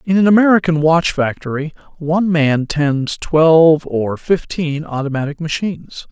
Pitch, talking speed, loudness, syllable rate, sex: 160 Hz, 130 wpm, -15 LUFS, 4.6 syllables/s, male